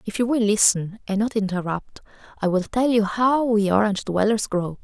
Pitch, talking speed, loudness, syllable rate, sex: 210 Hz, 200 wpm, -21 LUFS, 5.1 syllables/s, female